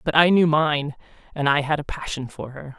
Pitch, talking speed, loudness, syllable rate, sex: 150 Hz, 235 wpm, -21 LUFS, 5.2 syllables/s, female